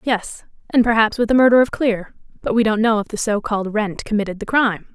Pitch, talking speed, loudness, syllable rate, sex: 220 Hz, 230 wpm, -18 LUFS, 6.0 syllables/s, female